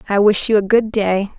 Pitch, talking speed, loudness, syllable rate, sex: 205 Hz, 260 wpm, -16 LUFS, 5.2 syllables/s, female